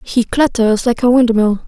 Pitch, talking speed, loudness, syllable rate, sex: 235 Hz, 180 wpm, -13 LUFS, 4.5 syllables/s, female